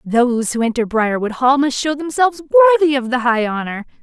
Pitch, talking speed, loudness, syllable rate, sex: 260 Hz, 195 wpm, -16 LUFS, 5.9 syllables/s, female